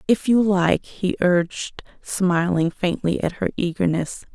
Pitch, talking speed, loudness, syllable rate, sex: 180 Hz, 140 wpm, -21 LUFS, 4.0 syllables/s, female